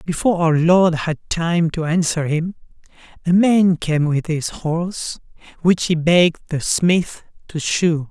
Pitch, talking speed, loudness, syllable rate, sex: 165 Hz, 155 wpm, -18 LUFS, 4.0 syllables/s, male